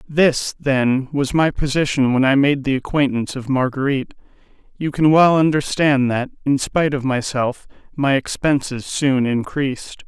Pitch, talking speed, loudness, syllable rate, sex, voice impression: 140 Hz, 150 wpm, -18 LUFS, 4.7 syllables/s, male, masculine, middle-aged, slightly muffled, slightly refreshing, sincere, slightly calm, slightly kind